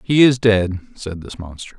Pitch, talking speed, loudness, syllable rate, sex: 105 Hz, 200 wpm, -16 LUFS, 4.7 syllables/s, male